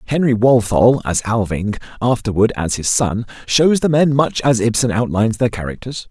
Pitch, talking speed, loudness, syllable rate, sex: 115 Hz, 165 wpm, -16 LUFS, 5.0 syllables/s, male